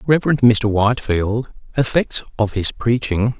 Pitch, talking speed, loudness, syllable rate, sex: 115 Hz, 125 wpm, -18 LUFS, 4.5 syllables/s, male